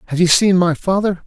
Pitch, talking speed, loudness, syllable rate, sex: 180 Hz, 235 wpm, -15 LUFS, 5.8 syllables/s, male